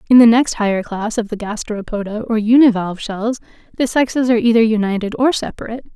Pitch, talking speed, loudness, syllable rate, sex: 225 Hz, 180 wpm, -16 LUFS, 6.5 syllables/s, female